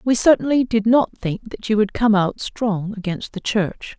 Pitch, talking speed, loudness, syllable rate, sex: 215 Hz, 210 wpm, -20 LUFS, 4.4 syllables/s, female